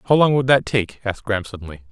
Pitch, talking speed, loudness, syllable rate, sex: 120 Hz, 250 wpm, -19 LUFS, 7.3 syllables/s, male